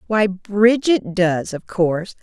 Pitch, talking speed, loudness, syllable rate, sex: 190 Hz, 135 wpm, -18 LUFS, 3.5 syllables/s, female